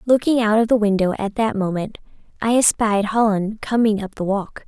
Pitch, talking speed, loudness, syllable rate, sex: 215 Hz, 190 wpm, -19 LUFS, 5.2 syllables/s, female